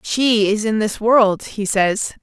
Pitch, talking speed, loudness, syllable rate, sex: 215 Hz, 190 wpm, -17 LUFS, 3.4 syllables/s, female